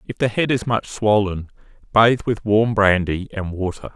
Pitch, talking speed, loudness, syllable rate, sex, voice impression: 105 Hz, 180 wpm, -19 LUFS, 4.6 syllables/s, male, very masculine, very adult-like, slightly middle-aged, very thick, slightly relaxed, slightly weak, bright, hard, clear, fluent, slightly raspy, cool, intellectual, very sincere, very calm, mature, friendly, reassuring, slightly unique, elegant, very sweet, kind, slightly modest